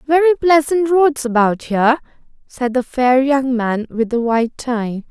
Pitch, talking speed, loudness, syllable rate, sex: 260 Hz, 165 wpm, -16 LUFS, 4.2 syllables/s, female